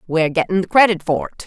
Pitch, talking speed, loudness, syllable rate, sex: 165 Hz, 245 wpm, -17 LUFS, 7.0 syllables/s, female